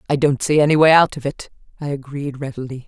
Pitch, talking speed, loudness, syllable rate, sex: 140 Hz, 230 wpm, -18 LUFS, 6.3 syllables/s, female